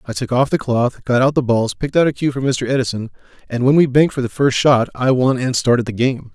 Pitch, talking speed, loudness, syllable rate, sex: 130 Hz, 285 wpm, -17 LUFS, 6.0 syllables/s, male